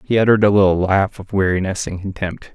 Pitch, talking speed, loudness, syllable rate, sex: 100 Hz, 210 wpm, -17 LUFS, 6.1 syllables/s, male